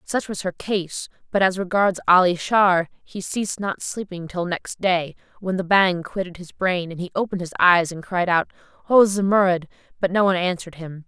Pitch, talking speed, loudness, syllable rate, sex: 185 Hz, 200 wpm, -21 LUFS, 5.2 syllables/s, female